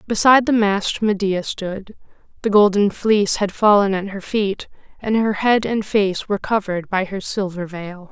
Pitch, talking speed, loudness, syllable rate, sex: 200 Hz, 175 wpm, -18 LUFS, 4.7 syllables/s, female